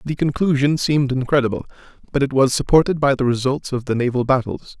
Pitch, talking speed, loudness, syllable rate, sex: 135 Hz, 190 wpm, -18 LUFS, 6.2 syllables/s, male